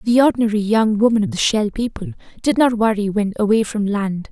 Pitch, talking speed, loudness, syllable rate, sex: 220 Hz, 210 wpm, -18 LUFS, 5.8 syllables/s, female